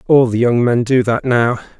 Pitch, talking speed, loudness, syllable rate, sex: 120 Hz, 235 wpm, -14 LUFS, 4.8 syllables/s, male